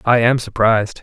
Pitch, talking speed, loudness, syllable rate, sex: 115 Hz, 175 wpm, -15 LUFS, 5.5 syllables/s, male